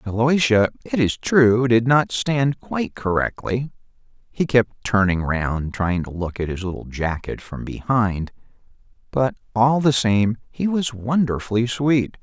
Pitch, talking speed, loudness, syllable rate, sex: 115 Hz, 145 wpm, -21 LUFS, 4.1 syllables/s, male